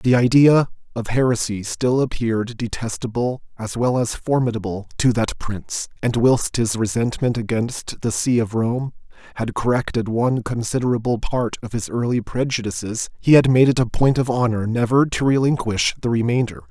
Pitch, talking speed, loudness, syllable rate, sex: 120 Hz, 160 wpm, -20 LUFS, 5.0 syllables/s, male